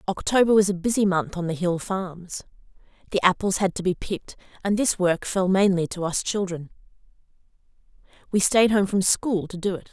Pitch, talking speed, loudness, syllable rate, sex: 190 Hz, 190 wpm, -23 LUFS, 5.3 syllables/s, female